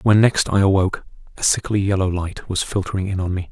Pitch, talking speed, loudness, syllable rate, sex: 95 Hz, 220 wpm, -19 LUFS, 6.1 syllables/s, male